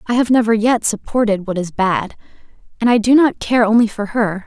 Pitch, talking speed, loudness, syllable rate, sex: 220 Hz, 215 wpm, -16 LUFS, 5.4 syllables/s, female